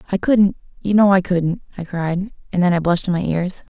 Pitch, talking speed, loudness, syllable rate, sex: 180 Hz, 210 wpm, -18 LUFS, 5.6 syllables/s, female